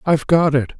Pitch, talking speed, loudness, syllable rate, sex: 150 Hz, 225 wpm, -16 LUFS, 6.0 syllables/s, male